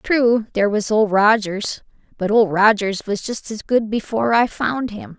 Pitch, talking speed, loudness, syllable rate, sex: 215 Hz, 185 wpm, -18 LUFS, 4.5 syllables/s, female